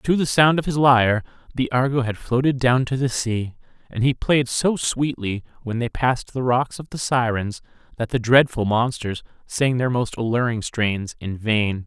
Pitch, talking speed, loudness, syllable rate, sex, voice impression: 125 Hz, 190 wpm, -21 LUFS, 4.7 syllables/s, male, very masculine, middle-aged, very thick, tensed, slightly powerful, bright, slightly soft, clear, fluent, slightly raspy, cool, intellectual, very refreshing, sincere, calm, mature, friendly, reassuring, unique, slightly elegant, slightly wild, sweet, lively, kind, slightly modest